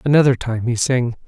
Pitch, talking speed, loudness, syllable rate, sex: 125 Hz, 190 wpm, -18 LUFS, 5.5 syllables/s, male